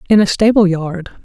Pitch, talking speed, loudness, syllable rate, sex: 190 Hz, 195 wpm, -13 LUFS, 5.3 syllables/s, female